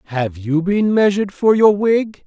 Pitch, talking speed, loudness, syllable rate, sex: 190 Hz, 185 wpm, -16 LUFS, 4.4 syllables/s, male